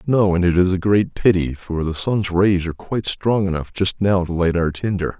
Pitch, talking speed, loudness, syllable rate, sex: 95 Hz, 245 wpm, -19 LUFS, 5.2 syllables/s, male